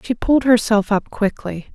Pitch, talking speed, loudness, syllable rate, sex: 225 Hz, 170 wpm, -17 LUFS, 4.9 syllables/s, female